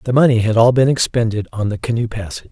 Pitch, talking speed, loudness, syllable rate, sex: 115 Hz, 240 wpm, -16 LUFS, 6.9 syllables/s, male